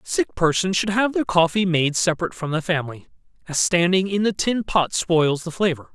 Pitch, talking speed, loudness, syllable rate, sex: 175 Hz, 200 wpm, -21 LUFS, 5.4 syllables/s, male